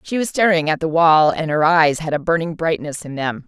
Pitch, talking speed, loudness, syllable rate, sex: 160 Hz, 260 wpm, -17 LUFS, 5.3 syllables/s, female